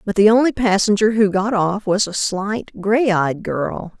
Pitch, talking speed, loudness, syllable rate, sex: 205 Hz, 195 wpm, -17 LUFS, 4.2 syllables/s, female